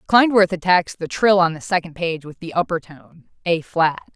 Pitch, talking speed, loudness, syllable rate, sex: 170 Hz, 190 wpm, -19 LUFS, 4.7 syllables/s, female